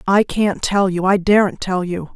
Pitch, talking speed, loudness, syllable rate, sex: 190 Hz, 195 wpm, -17 LUFS, 4.5 syllables/s, female